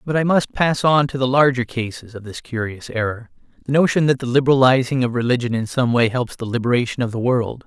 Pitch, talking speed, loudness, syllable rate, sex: 125 Hz, 225 wpm, -19 LUFS, 6.0 syllables/s, male